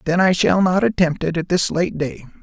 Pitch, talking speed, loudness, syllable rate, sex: 170 Hz, 245 wpm, -18 LUFS, 5.1 syllables/s, male